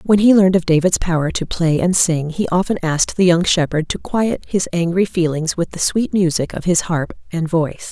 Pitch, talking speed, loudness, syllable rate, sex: 175 Hz, 225 wpm, -17 LUFS, 5.3 syllables/s, female